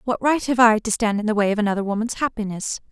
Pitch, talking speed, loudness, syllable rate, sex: 220 Hz, 270 wpm, -20 LUFS, 6.6 syllables/s, female